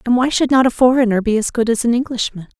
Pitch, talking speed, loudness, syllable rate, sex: 240 Hz, 280 wpm, -16 LUFS, 6.7 syllables/s, female